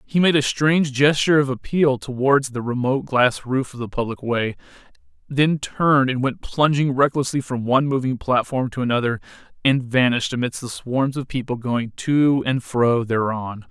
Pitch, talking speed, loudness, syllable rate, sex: 130 Hz, 175 wpm, -20 LUFS, 5.0 syllables/s, male